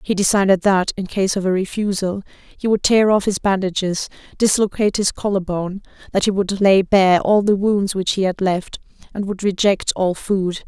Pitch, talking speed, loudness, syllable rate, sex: 195 Hz, 195 wpm, -18 LUFS, 4.9 syllables/s, female